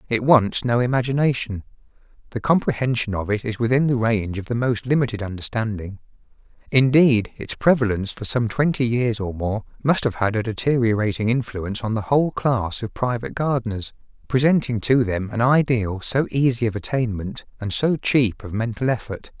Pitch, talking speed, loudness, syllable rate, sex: 115 Hz, 165 wpm, -21 LUFS, 5.4 syllables/s, male